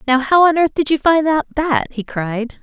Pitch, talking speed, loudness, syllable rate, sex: 285 Hz, 250 wpm, -16 LUFS, 4.9 syllables/s, female